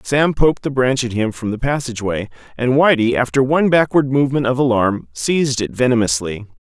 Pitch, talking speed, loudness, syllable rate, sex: 125 Hz, 180 wpm, -17 LUFS, 5.8 syllables/s, male